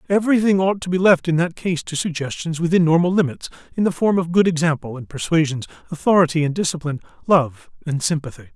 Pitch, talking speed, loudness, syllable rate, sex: 165 Hz, 190 wpm, -19 LUFS, 6.4 syllables/s, male